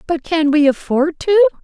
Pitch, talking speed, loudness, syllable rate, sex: 320 Hz, 185 wpm, -15 LUFS, 5.0 syllables/s, female